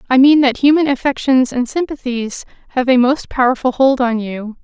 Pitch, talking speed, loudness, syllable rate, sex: 260 Hz, 180 wpm, -15 LUFS, 5.1 syllables/s, female